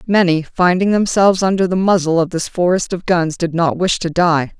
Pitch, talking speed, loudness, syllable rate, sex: 175 Hz, 210 wpm, -15 LUFS, 5.2 syllables/s, female